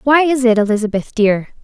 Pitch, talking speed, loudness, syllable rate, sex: 235 Hz, 185 wpm, -15 LUFS, 5.7 syllables/s, female